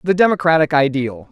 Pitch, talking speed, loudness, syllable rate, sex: 155 Hz, 135 wpm, -16 LUFS, 5.8 syllables/s, male